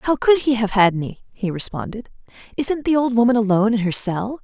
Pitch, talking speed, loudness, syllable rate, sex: 230 Hz, 215 wpm, -19 LUFS, 5.8 syllables/s, female